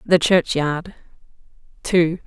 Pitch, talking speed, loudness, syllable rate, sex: 170 Hz, 80 wpm, -19 LUFS, 3.0 syllables/s, female